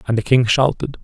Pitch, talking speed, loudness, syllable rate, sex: 125 Hz, 230 wpm, -16 LUFS, 6.0 syllables/s, male